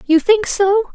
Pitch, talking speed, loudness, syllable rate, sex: 395 Hz, 190 wpm, -15 LUFS, 4.1 syllables/s, female